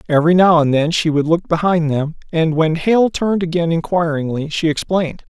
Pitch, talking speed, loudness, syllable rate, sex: 165 Hz, 190 wpm, -16 LUFS, 5.5 syllables/s, male